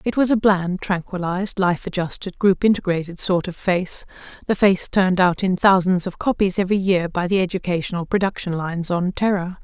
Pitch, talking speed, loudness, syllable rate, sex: 185 Hz, 175 wpm, -20 LUFS, 5.5 syllables/s, female